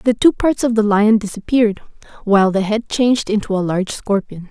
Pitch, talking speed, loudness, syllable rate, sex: 215 Hz, 200 wpm, -16 LUFS, 5.7 syllables/s, female